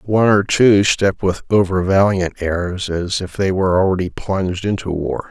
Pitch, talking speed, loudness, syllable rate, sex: 95 Hz, 170 wpm, -17 LUFS, 4.9 syllables/s, male